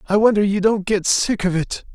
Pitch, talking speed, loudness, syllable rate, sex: 200 Hz, 245 wpm, -18 LUFS, 5.3 syllables/s, male